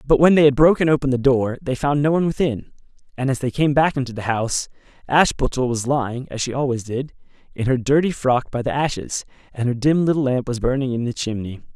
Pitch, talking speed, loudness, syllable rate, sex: 130 Hz, 230 wpm, -20 LUFS, 6.0 syllables/s, male